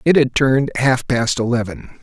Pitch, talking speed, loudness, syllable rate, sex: 125 Hz, 180 wpm, -17 LUFS, 5.1 syllables/s, male